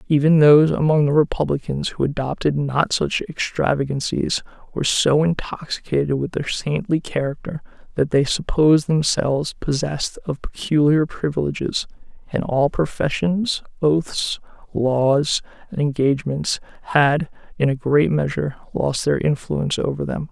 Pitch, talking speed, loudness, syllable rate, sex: 145 Hz, 125 wpm, -20 LUFS, 4.8 syllables/s, male